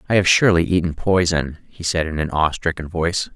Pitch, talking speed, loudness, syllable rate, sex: 85 Hz, 215 wpm, -19 LUFS, 5.8 syllables/s, male